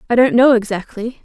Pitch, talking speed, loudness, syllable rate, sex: 235 Hz, 195 wpm, -14 LUFS, 5.9 syllables/s, female